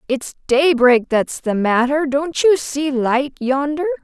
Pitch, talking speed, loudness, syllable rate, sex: 275 Hz, 150 wpm, -17 LUFS, 3.8 syllables/s, female